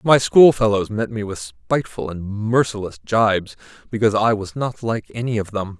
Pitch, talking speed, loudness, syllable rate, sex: 105 Hz, 175 wpm, -19 LUFS, 5.1 syllables/s, male